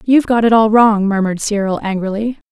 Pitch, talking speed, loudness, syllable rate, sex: 215 Hz, 190 wpm, -14 LUFS, 6.1 syllables/s, female